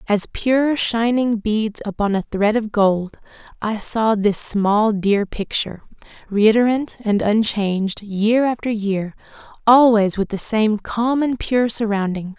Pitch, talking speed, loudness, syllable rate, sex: 215 Hz, 140 wpm, -19 LUFS, 3.8 syllables/s, female